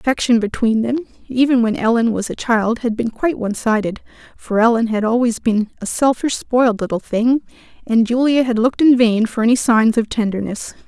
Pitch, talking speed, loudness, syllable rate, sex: 230 Hz, 195 wpm, -17 LUFS, 5.5 syllables/s, female